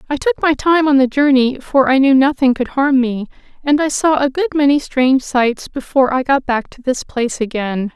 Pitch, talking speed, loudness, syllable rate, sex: 270 Hz, 225 wpm, -15 LUFS, 5.3 syllables/s, female